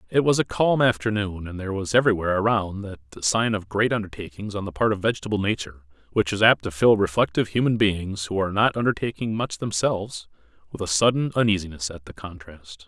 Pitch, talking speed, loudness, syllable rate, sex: 100 Hz, 195 wpm, -23 LUFS, 6.2 syllables/s, male